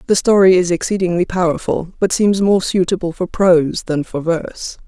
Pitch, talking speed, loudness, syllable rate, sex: 180 Hz, 170 wpm, -16 LUFS, 5.2 syllables/s, female